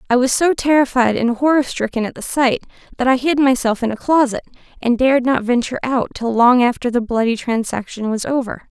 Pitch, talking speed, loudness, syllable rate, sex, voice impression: 245 Hz, 205 wpm, -17 LUFS, 5.8 syllables/s, female, feminine, slightly adult-like, slightly clear, slightly cute, slightly sincere, friendly